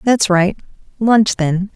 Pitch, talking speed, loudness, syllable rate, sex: 200 Hz, 135 wpm, -15 LUFS, 3.2 syllables/s, female